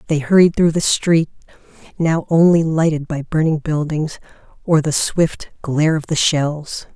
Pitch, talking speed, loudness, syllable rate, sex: 155 Hz, 155 wpm, -17 LUFS, 4.4 syllables/s, female